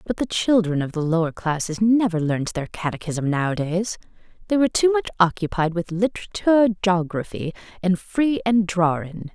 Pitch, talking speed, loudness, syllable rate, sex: 185 Hz, 155 wpm, -22 LUFS, 5.0 syllables/s, female